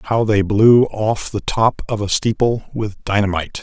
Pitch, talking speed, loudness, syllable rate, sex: 105 Hz, 180 wpm, -17 LUFS, 4.6 syllables/s, male